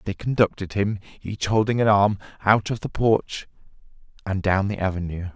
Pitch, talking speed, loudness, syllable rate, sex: 100 Hz, 170 wpm, -23 LUFS, 5.1 syllables/s, male